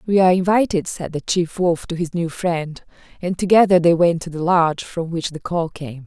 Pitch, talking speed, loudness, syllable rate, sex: 170 Hz, 230 wpm, -19 LUFS, 5.2 syllables/s, female